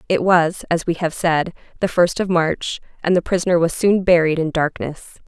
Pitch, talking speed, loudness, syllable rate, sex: 170 Hz, 205 wpm, -18 LUFS, 5.1 syllables/s, female